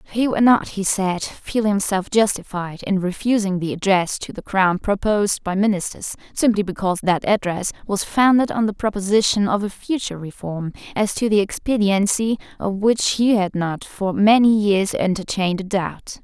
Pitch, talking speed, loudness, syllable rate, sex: 200 Hz, 170 wpm, -20 LUFS, 4.9 syllables/s, female